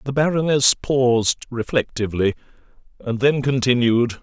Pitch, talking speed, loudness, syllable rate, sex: 125 Hz, 100 wpm, -19 LUFS, 4.8 syllables/s, male